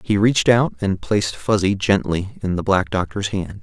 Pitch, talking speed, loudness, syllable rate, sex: 95 Hz, 200 wpm, -19 LUFS, 4.9 syllables/s, male